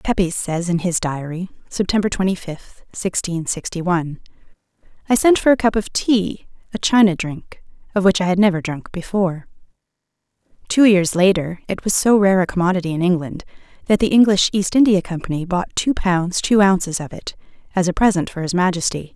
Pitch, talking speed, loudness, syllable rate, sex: 185 Hz, 175 wpm, -18 LUFS, 5.5 syllables/s, female